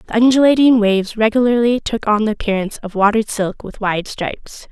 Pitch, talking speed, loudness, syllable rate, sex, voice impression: 220 Hz, 180 wpm, -16 LUFS, 5.9 syllables/s, female, feminine, adult-like, tensed, powerful, bright, clear, fluent, intellectual, friendly, lively, slightly intense